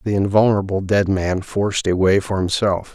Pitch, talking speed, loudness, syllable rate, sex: 100 Hz, 185 wpm, -18 LUFS, 5.3 syllables/s, male